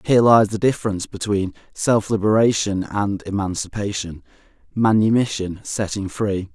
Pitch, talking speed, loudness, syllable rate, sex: 105 Hz, 110 wpm, -20 LUFS, 4.2 syllables/s, male